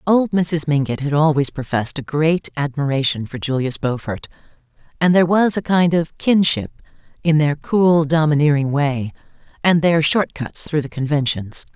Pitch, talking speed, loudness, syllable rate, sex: 150 Hz, 160 wpm, -18 LUFS, 4.8 syllables/s, female